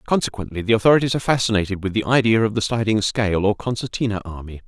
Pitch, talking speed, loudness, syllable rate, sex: 105 Hz, 195 wpm, -20 LUFS, 7.2 syllables/s, male